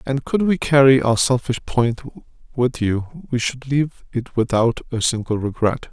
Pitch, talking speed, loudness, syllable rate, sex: 125 Hz, 170 wpm, -19 LUFS, 5.0 syllables/s, male